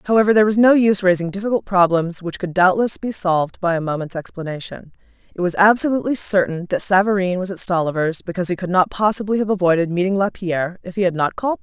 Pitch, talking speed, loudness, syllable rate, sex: 185 Hz, 215 wpm, -18 LUFS, 6.8 syllables/s, female